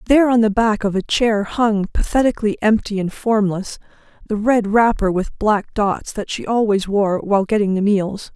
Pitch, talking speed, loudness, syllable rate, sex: 210 Hz, 185 wpm, -18 LUFS, 4.9 syllables/s, female